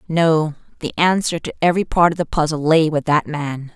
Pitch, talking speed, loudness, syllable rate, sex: 160 Hz, 210 wpm, -18 LUFS, 5.2 syllables/s, female